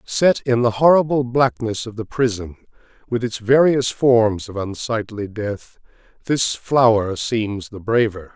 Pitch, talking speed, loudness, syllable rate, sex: 115 Hz, 145 wpm, -19 LUFS, 4.0 syllables/s, male